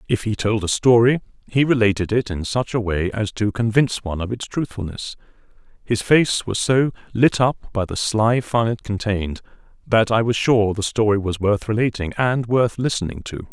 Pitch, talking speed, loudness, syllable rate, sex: 110 Hz, 195 wpm, -20 LUFS, 5.1 syllables/s, male